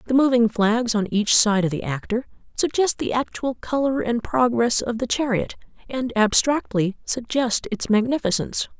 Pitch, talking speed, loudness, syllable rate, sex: 235 Hz, 155 wpm, -21 LUFS, 4.8 syllables/s, female